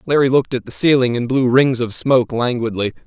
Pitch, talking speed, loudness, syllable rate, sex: 125 Hz, 215 wpm, -16 LUFS, 6.0 syllables/s, male